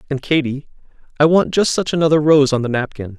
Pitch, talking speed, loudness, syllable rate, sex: 145 Hz, 205 wpm, -16 LUFS, 6.1 syllables/s, male